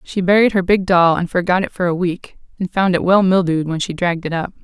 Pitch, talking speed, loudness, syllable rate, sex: 180 Hz, 270 wpm, -16 LUFS, 6.1 syllables/s, female